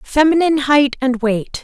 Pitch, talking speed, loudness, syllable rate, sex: 275 Hz, 145 wpm, -15 LUFS, 4.6 syllables/s, female